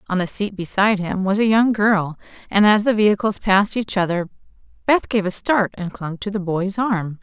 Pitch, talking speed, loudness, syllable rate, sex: 200 Hz, 215 wpm, -19 LUFS, 5.2 syllables/s, female